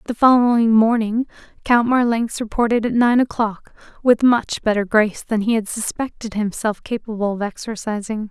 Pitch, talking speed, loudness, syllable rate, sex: 225 Hz, 150 wpm, -19 LUFS, 5.1 syllables/s, female